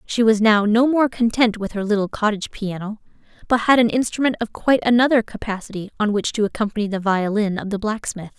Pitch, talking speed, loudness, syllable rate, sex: 220 Hz, 200 wpm, -19 LUFS, 6.0 syllables/s, female